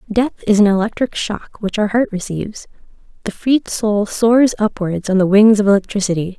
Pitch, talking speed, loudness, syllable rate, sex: 210 Hz, 180 wpm, -16 LUFS, 5.1 syllables/s, female